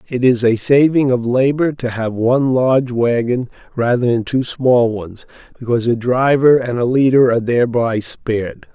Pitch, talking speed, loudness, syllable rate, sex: 125 Hz, 170 wpm, -15 LUFS, 4.9 syllables/s, male